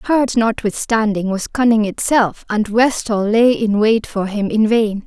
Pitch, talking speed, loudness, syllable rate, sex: 220 Hz, 165 wpm, -16 LUFS, 4.1 syllables/s, female